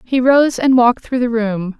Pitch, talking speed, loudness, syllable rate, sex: 240 Hz, 235 wpm, -14 LUFS, 4.7 syllables/s, female